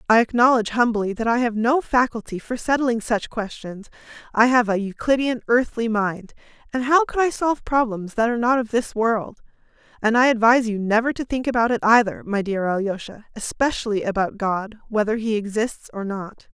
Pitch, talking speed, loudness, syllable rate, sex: 230 Hz, 185 wpm, -21 LUFS, 5.4 syllables/s, female